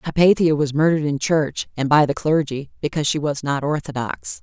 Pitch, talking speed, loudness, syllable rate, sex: 150 Hz, 190 wpm, -20 LUFS, 5.9 syllables/s, female